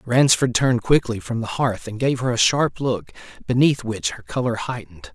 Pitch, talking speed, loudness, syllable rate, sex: 120 Hz, 200 wpm, -21 LUFS, 5.1 syllables/s, male